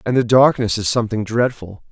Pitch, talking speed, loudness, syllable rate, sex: 115 Hz, 190 wpm, -17 LUFS, 5.7 syllables/s, male